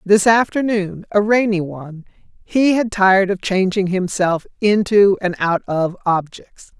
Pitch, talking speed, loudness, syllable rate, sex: 195 Hz, 140 wpm, -17 LUFS, 4.3 syllables/s, female